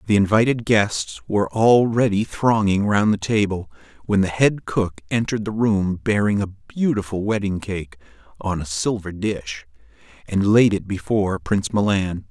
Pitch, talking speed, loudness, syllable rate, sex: 100 Hz, 150 wpm, -20 LUFS, 4.6 syllables/s, male